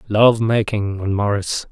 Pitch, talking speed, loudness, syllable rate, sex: 105 Hz, 140 wpm, -18 LUFS, 3.2 syllables/s, male